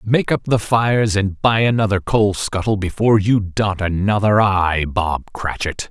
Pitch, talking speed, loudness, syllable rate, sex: 100 Hz, 165 wpm, -17 LUFS, 4.3 syllables/s, male